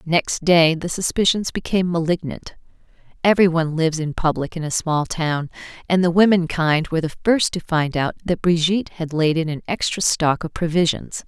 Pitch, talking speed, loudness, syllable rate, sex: 165 Hz, 180 wpm, -20 LUFS, 5.3 syllables/s, female